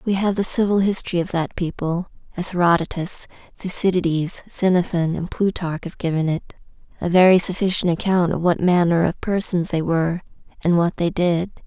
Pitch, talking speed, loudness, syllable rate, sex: 175 Hz, 165 wpm, -20 LUFS, 5.3 syllables/s, female